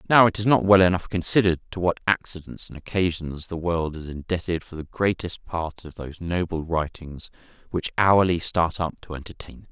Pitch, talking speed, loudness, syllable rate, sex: 85 Hz, 190 wpm, -23 LUFS, 5.4 syllables/s, male